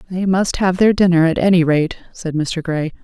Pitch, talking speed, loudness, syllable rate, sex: 175 Hz, 220 wpm, -16 LUFS, 5.1 syllables/s, female